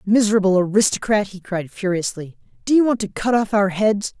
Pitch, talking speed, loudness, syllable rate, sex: 205 Hz, 185 wpm, -19 LUFS, 5.5 syllables/s, female